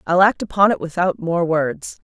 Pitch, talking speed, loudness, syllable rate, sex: 175 Hz, 200 wpm, -18 LUFS, 4.8 syllables/s, female